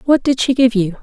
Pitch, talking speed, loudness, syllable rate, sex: 240 Hz, 290 wpm, -14 LUFS, 5.8 syllables/s, female